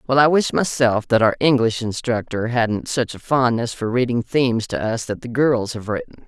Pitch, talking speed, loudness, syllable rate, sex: 120 Hz, 210 wpm, -20 LUFS, 4.9 syllables/s, female